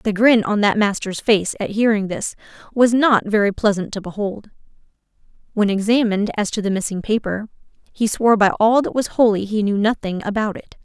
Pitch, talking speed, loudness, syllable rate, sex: 210 Hz, 190 wpm, -18 LUFS, 5.5 syllables/s, female